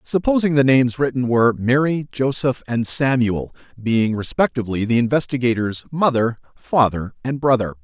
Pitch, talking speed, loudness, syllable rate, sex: 125 Hz, 130 wpm, -19 LUFS, 5.2 syllables/s, male